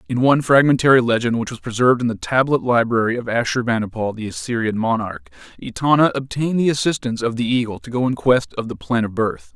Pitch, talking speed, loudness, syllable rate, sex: 120 Hz, 205 wpm, -19 LUFS, 6.3 syllables/s, male